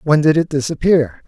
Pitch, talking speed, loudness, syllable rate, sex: 150 Hz, 190 wpm, -15 LUFS, 5.2 syllables/s, male